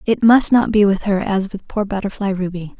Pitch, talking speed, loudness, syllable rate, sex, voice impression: 200 Hz, 235 wpm, -17 LUFS, 5.3 syllables/s, female, very feminine, very adult-like, middle-aged, thin, tensed, slightly powerful, bright, slightly soft, clear, fluent, cute, intellectual, very refreshing, sincere, calm, very friendly, very reassuring, slightly unique, very elegant, sweet, lively, kind, slightly intense, light